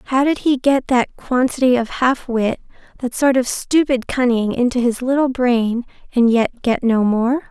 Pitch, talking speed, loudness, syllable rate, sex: 250 Hz, 185 wpm, -17 LUFS, 4.4 syllables/s, female